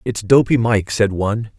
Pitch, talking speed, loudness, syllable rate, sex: 110 Hz, 190 wpm, -16 LUFS, 4.9 syllables/s, male